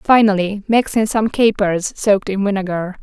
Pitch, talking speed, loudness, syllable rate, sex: 205 Hz, 160 wpm, -16 LUFS, 4.8 syllables/s, female